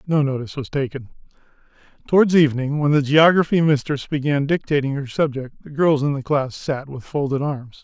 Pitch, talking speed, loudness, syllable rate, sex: 140 Hz, 175 wpm, -20 LUFS, 5.6 syllables/s, male